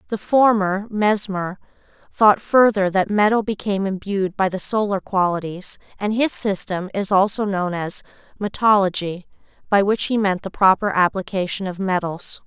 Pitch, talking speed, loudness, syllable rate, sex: 195 Hz, 145 wpm, -20 LUFS, 4.8 syllables/s, female